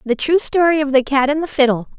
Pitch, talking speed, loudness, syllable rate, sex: 280 Hz, 270 wpm, -16 LUFS, 6.1 syllables/s, female